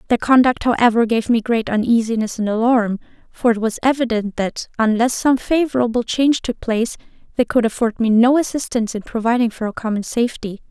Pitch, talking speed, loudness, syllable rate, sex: 235 Hz, 180 wpm, -18 LUFS, 5.8 syllables/s, female